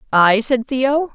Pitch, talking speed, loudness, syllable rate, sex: 250 Hz, 155 wpm, -16 LUFS, 3.3 syllables/s, female